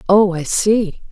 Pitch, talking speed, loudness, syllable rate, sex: 190 Hz, 160 wpm, -16 LUFS, 3.4 syllables/s, female